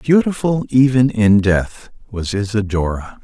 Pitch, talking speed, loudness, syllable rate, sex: 110 Hz, 110 wpm, -16 LUFS, 4.0 syllables/s, male